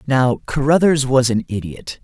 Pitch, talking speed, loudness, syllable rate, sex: 135 Hz, 145 wpm, -17 LUFS, 4.4 syllables/s, male